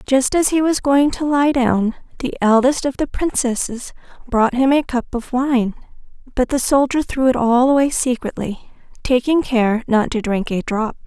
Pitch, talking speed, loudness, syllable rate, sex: 255 Hz, 185 wpm, -17 LUFS, 4.5 syllables/s, female